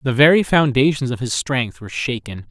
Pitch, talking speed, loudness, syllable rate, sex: 125 Hz, 190 wpm, -18 LUFS, 5.4 syllables/s, male